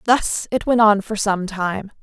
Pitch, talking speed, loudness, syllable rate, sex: 210 Hz, 205 wpm, -19 LUFS, 4.0 syllables/s, female